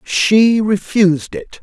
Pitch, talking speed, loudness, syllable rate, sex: 190 Hz, 110 wpm, -14 LUFS, 3.3 syllables/s, male